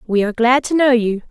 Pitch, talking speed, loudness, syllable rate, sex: 240 Hz, 275 wpm, -15 LUFS, 6.4 syllables/s, female